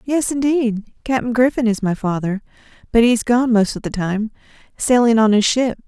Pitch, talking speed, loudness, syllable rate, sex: 230 Hz, 195 wpm, -17 LUFS, 4.7 syllables/s, female